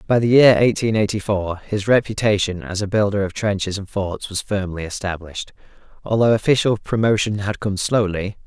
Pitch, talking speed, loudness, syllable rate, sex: 100 Hz, 170 wpm, -19 LUFS, 5.3 syllables/s, male